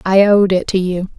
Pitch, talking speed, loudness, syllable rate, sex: 190 Hz, 255 wpm, -14 LUFS, 4.9 syllables/s, female